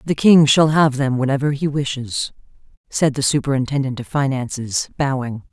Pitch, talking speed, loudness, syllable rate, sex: 135 Hz, 150 wpm, -18 LUFS, 5.0 syllables/s, female